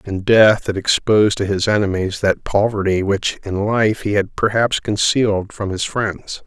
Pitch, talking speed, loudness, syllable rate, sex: 105 Hz, 175 wpm, -17 LUFS, 4.5 syllables/s, male